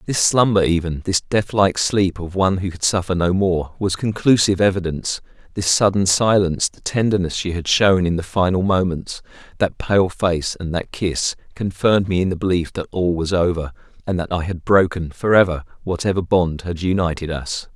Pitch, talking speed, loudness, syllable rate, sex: 90 Hz, 180 wpm, -19 LUFS, 5.3 syllables/s, male